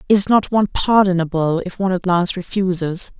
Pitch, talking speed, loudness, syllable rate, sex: 185 Hz, 170 wpm, -17 LUFS, 5.4 syllables/s, female